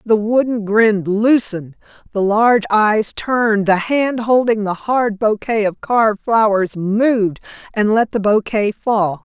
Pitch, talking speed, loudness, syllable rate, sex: 215 Hz, 150 wpm, -16 LUFS, 4.0 syllables/s, female